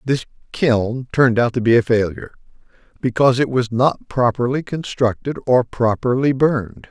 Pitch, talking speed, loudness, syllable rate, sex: 125 Hz, 150 wpm, -18 LUFS, 5.0 syllables/s, male